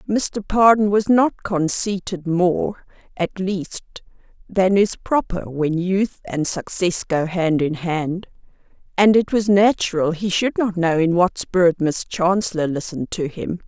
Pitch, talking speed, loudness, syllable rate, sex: 185 Hz, 155 wpm, -19 LUFS, 4.0 syllables/s, female